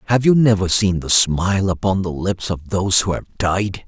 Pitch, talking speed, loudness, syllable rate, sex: 95 Hz, 215 wpm, -17 LUFS, 5.1 syllables/s, male